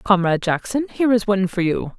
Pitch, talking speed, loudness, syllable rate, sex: 205 Hz, 210 wpm, -19 LUFS, 6.5 syllables/s, female